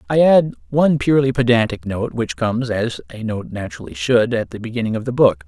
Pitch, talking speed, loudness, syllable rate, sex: 120 Hz, 210 wpm, -18 LUFS, 6.0 syllables/s, male